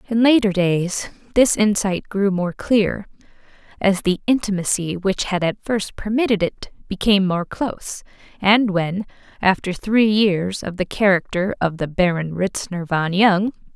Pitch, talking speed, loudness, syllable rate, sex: 195 Hz, 150 wpm, -19 LUFS, 4.3 syllables/s, female